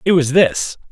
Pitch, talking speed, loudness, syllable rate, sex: 140 Hz, 195 wpm, -15 LUFS, 4.3 syllables/s, male